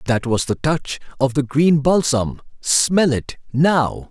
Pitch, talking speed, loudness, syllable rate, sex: 140 Hz, 145 wpm, -18 LUFS, 3.5 syllables/s, male